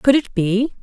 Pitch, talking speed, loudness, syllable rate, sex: 230 Hz, 220 wpm, -18 LUFS, 4.1 syllables/s, female